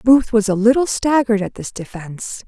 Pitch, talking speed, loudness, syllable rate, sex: 225 Hz, 195 wpm, -17 LUFS, 5.5 syllables/s, female